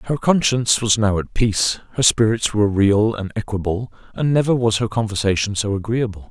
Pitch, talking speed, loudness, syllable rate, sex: 110 Hz, 180 wpm, -19 LUFS, 5.5 syllables/s, male